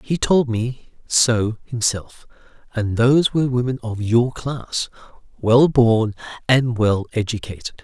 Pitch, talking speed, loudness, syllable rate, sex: 120 Hz, 130 wpm, -19 LUFS, 3.9 syllables/s, male